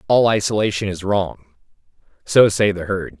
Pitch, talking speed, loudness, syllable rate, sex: 100 Hz, 150 wpm, -18 LUFS, 4.7 syllables/s, male